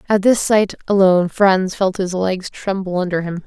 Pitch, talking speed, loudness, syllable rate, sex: 190 Hz, 190 wpm, -17 LUFS, 4.7 syllables/s, female